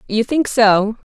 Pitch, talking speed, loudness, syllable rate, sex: 225 Hz, 160 wpm, -15 LUFS, 3.5 syllables/s, female